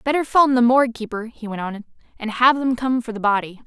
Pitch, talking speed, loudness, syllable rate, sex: 240 Hz, 245 wpm, -19 LUFS, 6.2 syllables/s, female